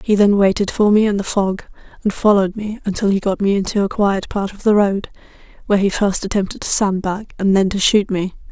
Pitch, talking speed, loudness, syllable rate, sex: 200 Hz, 235 wpm, -17 LUFS, 5.8 syllables/s, female